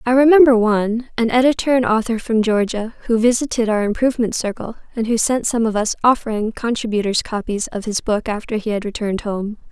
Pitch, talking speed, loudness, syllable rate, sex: 225 Hz, 190 wpm, -18 LUFS, 5.9 syllables/s, female